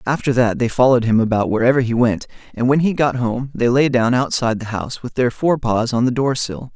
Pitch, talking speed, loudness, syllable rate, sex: 125 Hz, 250 wpm, -17 LUFS, 5.8 syllables/s, male